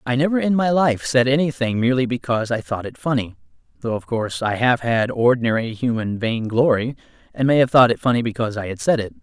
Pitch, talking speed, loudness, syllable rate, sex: 125 Hz, 215 wpm, -19 LUFS, 6.2 syllables/s, male